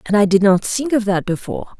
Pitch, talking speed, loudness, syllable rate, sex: 205 Hz, 265 wpm, -17 LUFS, 6.3 syllables/s, female